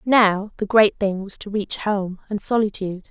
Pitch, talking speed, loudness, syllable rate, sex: 205 Hz, 195 wpm, -21 LUFS, 4.6 syllables/s, female